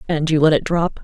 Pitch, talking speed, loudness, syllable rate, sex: 160 Hz, 290 wpm, -17 LUFS, 6.0 syllables/s, female